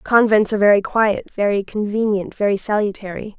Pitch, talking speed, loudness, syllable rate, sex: 205 Hz, 140 wpm, -18 LUFS, 5.5 syllables/s, female